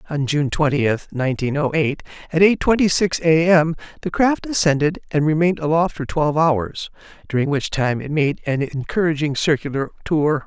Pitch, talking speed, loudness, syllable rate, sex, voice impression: 155 Hz, 170 wpm, -19 LUFS, 5.2 syllables/s, male, masculine, very adult-like, slightly thick, slightly fluent, slightly refreshing, sincere, slightly unique